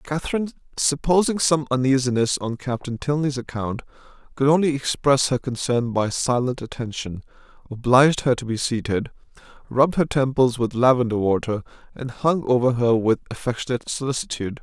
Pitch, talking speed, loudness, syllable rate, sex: 130 Hz, 140 wpm, -22 LUFS, 5.5 syllables/s, male